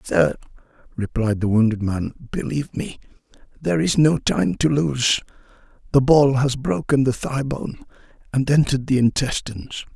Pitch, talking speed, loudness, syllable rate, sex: 130 Hz, 145 wpm, -20 LUFS, 4.9 syllables/s, male